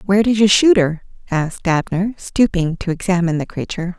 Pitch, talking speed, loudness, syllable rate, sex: 185 Hz, 180 wpm, -17 LUFS, 5.9 syllables/s, female